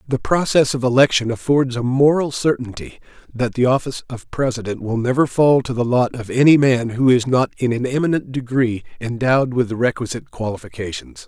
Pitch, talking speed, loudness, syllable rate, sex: 125 Hz, 180 wpm, -18 LUFS, 5.6 syllables/s, male